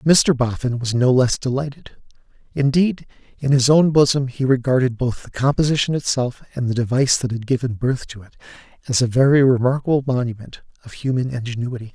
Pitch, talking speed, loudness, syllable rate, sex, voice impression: 130 Hz, 170 wpm, -19 LUFS, 5.7 syllables/s, male, masculine, middle-aged, slightly relaxed, powerful, soft, raspy, intellectual, sincere, calm, slightly mature, friendly, reassuring, slightly wild, lively, slightly modest